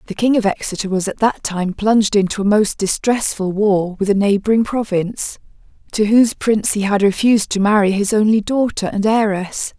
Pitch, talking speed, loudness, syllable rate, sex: 210 Hz, 190 wpm, -16 LUFS, 5.4 syllables/s, female